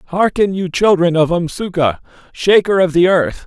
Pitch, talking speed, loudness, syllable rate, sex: 175 Hz, 155 wpm, -14 LUFS, 4.5 syllables/s, male